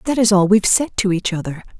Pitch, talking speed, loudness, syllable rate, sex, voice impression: 200 Hz, 265 wpm, -16 LUFS, 6.6 syllables/s, female, very feminine, adult-like, fluent, slightly intellectual